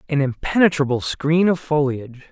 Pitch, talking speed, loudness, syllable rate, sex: 145 Hz, 130 wpm, -19 LUFS, 5.2 syllables/s, male